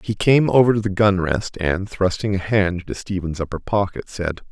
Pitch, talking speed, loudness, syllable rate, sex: 100 Hz, 200 wpm, -20 LUFS, 5.1 syllables/s, male